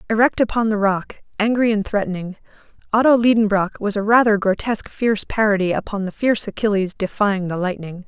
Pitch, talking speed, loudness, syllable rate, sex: 210 Hz, 165 wpm, -19 LUFS, 5.9 syllables/s, female